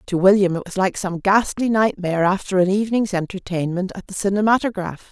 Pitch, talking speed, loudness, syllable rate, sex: 195 Hz, 175 wpm, -20 LUFS, 5.9 syllables/s, female